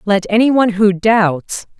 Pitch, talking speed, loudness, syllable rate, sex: 205 Hz, 135 wpm, -13 LUFS, 3.8 syllables/s, female